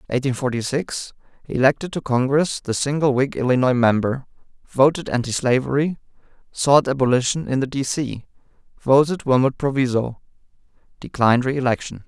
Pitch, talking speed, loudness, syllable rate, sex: 135 Hz, 115 wpm, -20 LUFS, 5.3 syllables/s, male